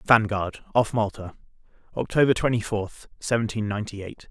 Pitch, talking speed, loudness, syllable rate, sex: 110 Hz, 125 wpm, -24 LUFS, 5.4 syllables/s, male